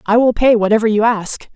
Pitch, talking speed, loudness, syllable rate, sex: 220 Hz, 230 wpm, -14 LUFS, 5.7 syllables/s, female